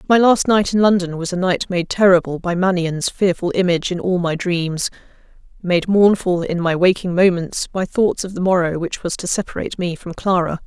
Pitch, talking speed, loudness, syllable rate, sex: 180 Hz, 195 wpm, -18 LUFS, 5.2 syllables/s, female